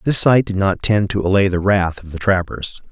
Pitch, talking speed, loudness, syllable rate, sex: 95 Hz, 245 wpm, -17 LUFS, 5.1 syllables/s, male